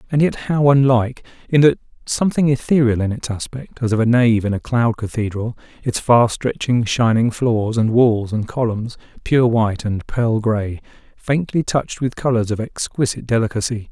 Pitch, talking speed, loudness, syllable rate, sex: 120 Hz, 170 wpm, -18 LUFS, 5.0 syllables/s, male